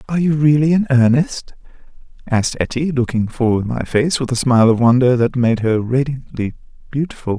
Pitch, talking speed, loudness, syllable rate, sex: 130 Hz, 180 wpm, -16 LUFS, 5.6 syllables/s, male